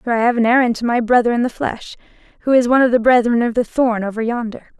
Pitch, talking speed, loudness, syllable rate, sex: 235 Hz, 275 wpm, -16 LUFS, 6.8 syllables/s, female